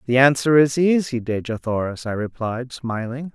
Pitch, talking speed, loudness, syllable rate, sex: 125 Hz, 160 wpm, -21 LUFS, 4.7 syllables/s, male